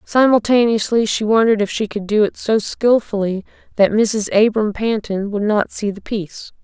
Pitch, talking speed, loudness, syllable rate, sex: 215 Hz, 170 wpm, -17 LUFS, 4.9 syllables/s, female